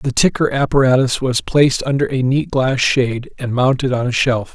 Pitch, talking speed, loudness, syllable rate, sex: 130 Hz, 200 wpm, -16 LUFS, 5.2 syllables/s, male